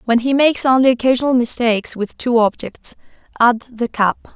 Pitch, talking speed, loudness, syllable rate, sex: 240 Hz, 165 wpm, -16 LUFS, 5.5 syllables/s, female